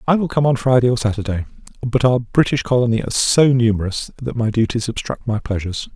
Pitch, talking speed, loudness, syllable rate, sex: 120 Hz, 200 wpm, -18 LUFS, 6.1 syllables/s, male